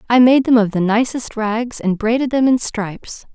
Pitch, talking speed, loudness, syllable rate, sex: 230 Hz, 215 wpm, -16 LUFS, 4.8 syllables/s, female